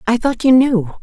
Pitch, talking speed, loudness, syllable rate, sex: 230 Hz, 235 wpm, -14 LUFS, 5.0 syllables/s, female